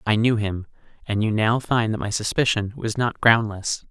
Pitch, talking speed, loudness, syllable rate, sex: 110 Hz, 200 wpm, -22 LUFS, 4.8 syllables/s, male